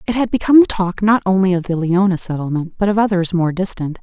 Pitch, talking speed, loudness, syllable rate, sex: 190 Hz, 240 wpm, -16 LUFS, 6.3 syllables/s, female